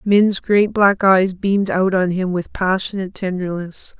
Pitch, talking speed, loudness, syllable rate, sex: 190 Hz, 165 wpm, -17 LUFS, 4.4 syllables/s, female